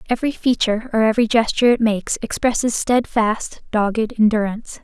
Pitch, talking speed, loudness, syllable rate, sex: 225 Hz, 135 wpm, -18 LUFS, 6.1 syllables/s, female